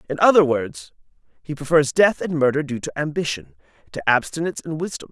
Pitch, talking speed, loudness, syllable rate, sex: 140 Hz, 175 wpm, -20 LUFS, 6.0 syllables/s, male